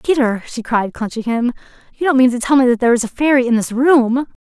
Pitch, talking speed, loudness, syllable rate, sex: 250 Hz, 255 wpm, -15 LUFS, 6.1 syllables/s, female